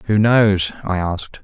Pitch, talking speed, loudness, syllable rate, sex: 100 Hz, 165 wpm, -17 LUFS, 4.0 syllables/s, male